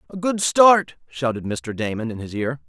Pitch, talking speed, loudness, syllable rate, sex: 140 Hz, 200 wpm, -20 LUFS, 4.7 syllables/s, male